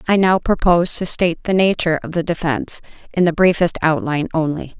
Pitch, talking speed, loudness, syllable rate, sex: 170 Hz, 190 wpm, -17 LUFS, 6.2 syllables/s, female